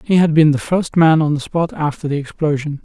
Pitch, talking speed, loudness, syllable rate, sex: 155 Hz, 255 wpm, -16 LUFS, 5.5 syllables/s, male